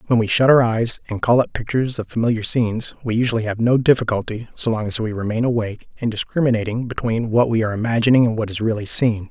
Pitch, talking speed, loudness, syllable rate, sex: 115 Hz, 225 wpm, -19 LUFS, 6.6 syllables/s, male